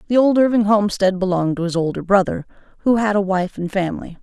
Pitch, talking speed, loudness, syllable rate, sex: 195 Hz, 215 wpm, -18 LUFS, 6.6 syllables/s, female